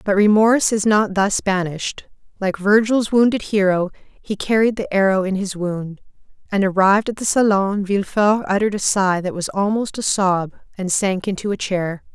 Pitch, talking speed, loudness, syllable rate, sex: 200 Hz, 180 wpm, -18 LUFS, 5.0 syllables/s, female